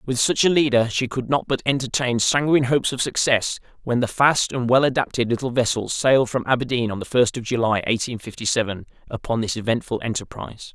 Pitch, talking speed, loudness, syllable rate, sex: 120 Hz, 200 wpm, -21 LUFS, 5.9 syllables/s, male